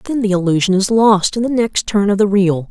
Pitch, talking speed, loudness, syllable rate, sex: 200 Hz, 265 wpm, -14 LUFS, 5.5 syllables/s, female